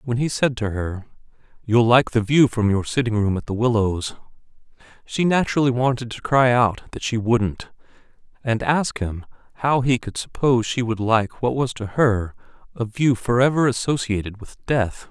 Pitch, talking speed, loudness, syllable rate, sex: 120 Hz, 185 wpm, -21 LUFS, 4.8 syllables/s, male